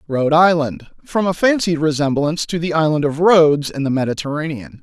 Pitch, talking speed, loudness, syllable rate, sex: 155 Hz, 160 wpm, -17 LUFS, 5.8 syllables/s, male